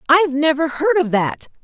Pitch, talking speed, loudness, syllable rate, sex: 300 Hz, 185 wpm, -17 LUFS, 5.3 syllables/s, female